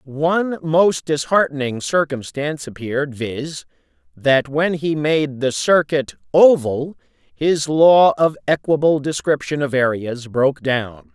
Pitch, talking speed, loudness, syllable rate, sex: 150 Hz, 120 wpm, -18 LUFS, 3.9 syllables/s, male